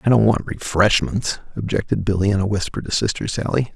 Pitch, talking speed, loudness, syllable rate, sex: 105 Hz, 190 wpm, -20 LUFS, 5.9 syllables/s, male